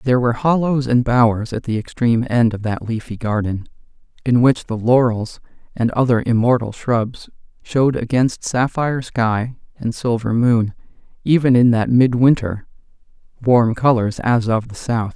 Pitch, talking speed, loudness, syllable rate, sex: 120 Hz, 150 wpm, -18 LUFS, 4.7 syllables/s, male